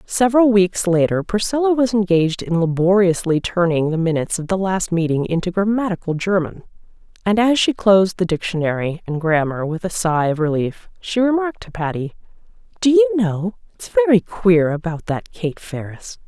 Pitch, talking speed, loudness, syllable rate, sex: 185 Hz, 165 wpm, -18 LUFS, 5.3 syllables/s, female